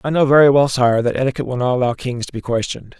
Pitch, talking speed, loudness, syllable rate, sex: 130 Hz, 280 wpm, -17 LUFS, 7.3 syllables/s, male